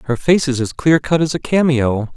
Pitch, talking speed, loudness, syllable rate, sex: 140 Hz, 250 wpm, -16 LUFS, 5.1 syllables/s, male